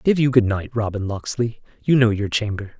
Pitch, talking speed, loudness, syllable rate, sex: 115 Hz, 195 wpm, -21 LUFS, 5.2 syllables/s, male